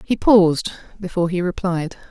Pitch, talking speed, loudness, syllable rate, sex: 185 Hz, 145 wpm, -18 LUFS, 5.6 syllables/s, female